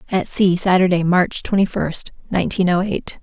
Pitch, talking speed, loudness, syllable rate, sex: 185 Hz, 165 wpm, -18 LUFS, 5.0 syllables/s, female